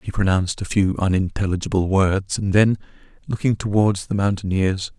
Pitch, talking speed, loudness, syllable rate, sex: 100 Hz, 145 wpm, -20 LUFS, 5.2 syllables/s, male